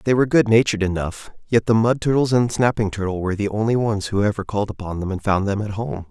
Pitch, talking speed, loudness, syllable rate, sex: 105 Hz, 245 wpm, -20 LUFS, 6.5 syllables/s, male